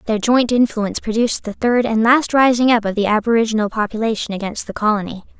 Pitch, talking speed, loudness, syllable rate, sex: 225 Hz, 190 wpm, -17 LUFS, 6.3 syllables/s, female